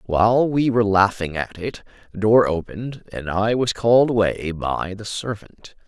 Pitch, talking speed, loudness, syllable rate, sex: 105 Hz, 175 wpm, -20 LUFS, 4.8 syllables/s, male